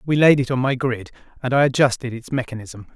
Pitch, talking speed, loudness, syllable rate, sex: 130 Hz, 225 wpm, -20 LUFS, 6.2 syllables/s, male